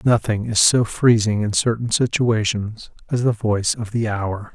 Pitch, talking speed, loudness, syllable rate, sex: 110 Hz, 170 wpm, -19 LUFS, 4.4 syllables/s, male